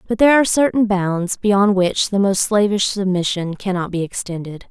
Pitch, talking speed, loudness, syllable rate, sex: 195 Hz, 180 wpm, -17 LUFS, 5.1 syllables/s, female